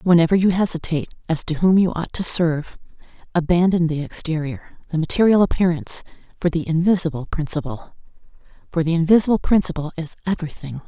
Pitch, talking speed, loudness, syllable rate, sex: 170 Hz, 145 wpm, -20 LUFS, 6.4 syllables/s, female